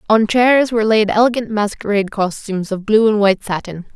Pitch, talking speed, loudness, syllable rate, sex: 210 Hz, 180 wpm, -15 LUFS, 5.9 syllables/s, female